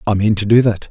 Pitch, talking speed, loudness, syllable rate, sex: 105 Hz, 330 wpm, -14 LUFS, 6.5 syllables/s, male